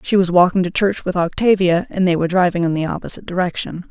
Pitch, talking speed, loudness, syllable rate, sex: 180 Hz, 230 wpm, -17 LUFS, 6.6 syllables/s, female